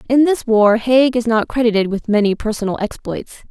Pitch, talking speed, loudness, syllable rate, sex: 230 Hz, 190 wpm, -16 LUFS, 5.3 syllables/s, female